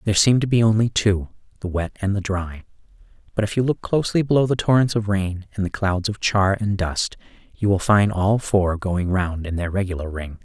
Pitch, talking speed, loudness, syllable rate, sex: 100 Hz, 220 wpm, -21 LUFS, 5.4 syllables/s, male